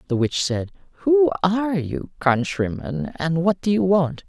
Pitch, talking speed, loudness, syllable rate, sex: 155 Hz, 170 wpm, -21 LUFS, 4.3 syllables/s, male